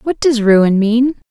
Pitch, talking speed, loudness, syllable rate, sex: 235 Hz, 185 wpm, -13 LUFS, 3.5 syllables/s, female